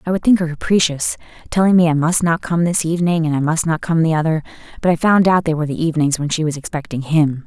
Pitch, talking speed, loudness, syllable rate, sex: 160 Hz, 255 wpm, -17 LUFS, 6.6 syllables/s, female